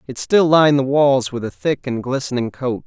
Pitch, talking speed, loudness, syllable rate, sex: 135 Hz, 230 wpm, -17 LUFS, 5.2 syllables/s, male